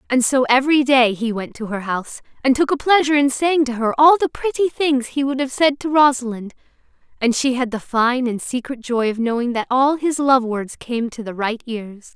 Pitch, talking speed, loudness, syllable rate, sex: 255 Hz, 230 wpm, -18 LUFS, 5.2 syllables/s, female